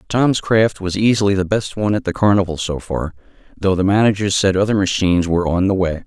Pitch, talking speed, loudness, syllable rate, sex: 95 Hz, 220 wpm, -17 LUFS, 6.0 syllables/s, male